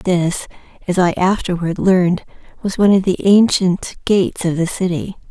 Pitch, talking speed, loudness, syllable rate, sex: 185 Hz, 160 wpm, -16 LUFS, 4.0 syllables/s, female